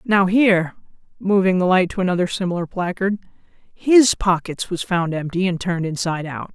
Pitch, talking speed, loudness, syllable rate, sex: 185 Hz, 165 wpm, -19 LUFS, 5.5 syllables/s, female